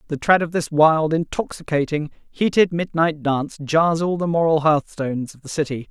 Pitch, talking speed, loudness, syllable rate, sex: 155 Hz, 175 wpm, -20 LUFS, 5.0 syllables/s, male